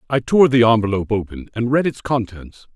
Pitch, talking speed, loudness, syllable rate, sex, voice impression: 115 Hz, 195 wpm, -17 LUFS, 5.7 syllables/s, male, very masculine, slightly old, thick, powerful, cool, slightly wild